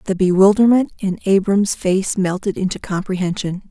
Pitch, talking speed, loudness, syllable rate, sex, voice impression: 190 Hz, 130 wpm, -17 LUFS, 5.0 syllables/s, female, very feminine, very adult-like, slightly middle-aged, slightly thin, relaxed, weak, dark, slightly soft, slightly muffled, fluent, very cute, intellectual, refreshing, very sincere, very calm, very friendly, very reassuring, very unique, very elegant, slightly wild, very sweet, slightly lively, very kind, very modest